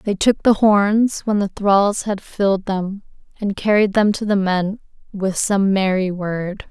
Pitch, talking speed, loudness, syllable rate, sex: 200 Hz, 180 wpm, -18 LUFS, 3.9 syllables/s, female